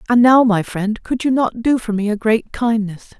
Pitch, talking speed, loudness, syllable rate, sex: 225 Hz, 245 wpm, -17 LUFS, 4.7 syllables/s, female